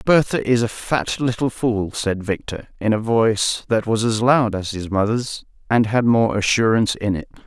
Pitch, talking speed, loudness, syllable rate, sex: 110 Hz, 195 wpm, -19 LUFS, 4.7 syllables/s, male